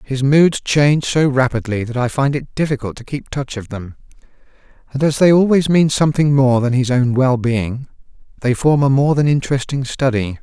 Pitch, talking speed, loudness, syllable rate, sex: 135 Hz, 190 wpm, -16 LUFS, 5.2 syllables/s, male